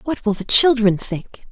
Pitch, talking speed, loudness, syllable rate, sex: 225 Hz, 200 wpm, -16 LUFS, 4.4 syllables/s, female